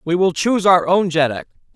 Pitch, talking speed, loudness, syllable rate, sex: 170 Hz, 205 wpm, -16 LUFS, 5.7 syllables/s, male